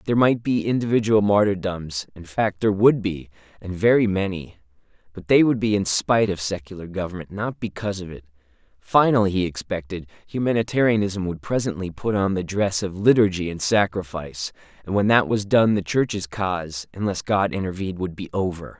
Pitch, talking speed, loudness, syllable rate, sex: 100 Hz, 165 wpm, -22 LUFS, 5.6 syllables/s, male